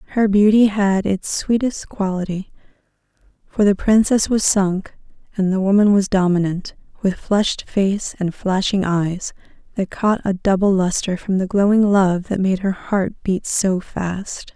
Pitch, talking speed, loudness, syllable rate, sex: 195 Hz, 155 wpm, -18 LUFS, 4.3 syllables/s, female